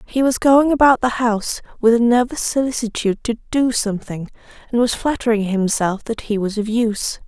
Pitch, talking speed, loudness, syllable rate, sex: 230 Hz, 180 wpm, -18 LUFS, 5.4 syllables/s, female